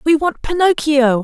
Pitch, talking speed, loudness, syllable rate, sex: 300 Hz, 145 wpm, -15 LUFS, 4.2 syllables/s, female